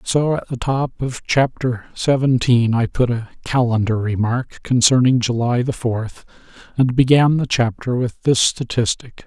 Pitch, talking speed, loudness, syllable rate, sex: 125 Hz, 150 wpm, -18 LUFS, 4.3 syllables/s, male